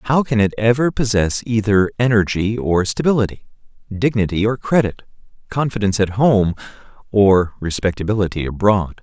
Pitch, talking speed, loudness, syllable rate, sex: 105 Hz, 120 wpm, -17 LUFS, 5.1 syllables/s, male